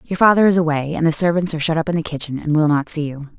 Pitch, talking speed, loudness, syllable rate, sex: 160 Hz, 320 wpm, -18 LUFS, 7.1 syllables/s, female